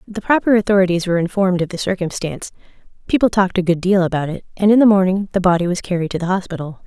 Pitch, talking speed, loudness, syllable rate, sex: 185 Hz, 225 wpm, -17 LUFS, 7.4 syllables/s, female